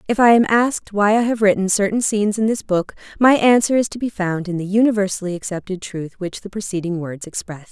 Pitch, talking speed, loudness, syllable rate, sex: 200 Hz, 225 wpm, -18 LUFS, 5.9 syllables/s, female